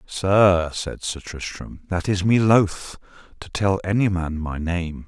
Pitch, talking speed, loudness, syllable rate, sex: 90 Hz, 165 wpm, -21 LUFS, 3.7 syllables/s, male